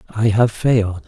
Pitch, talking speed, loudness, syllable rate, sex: 110 Hz, 170 wpm, -17 LUFS, 4.9 syllables/s, male